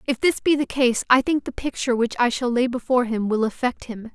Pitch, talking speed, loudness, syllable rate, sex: 245 Hz, 260 wpm, -21 LUFS, 5.9 syllables/s, female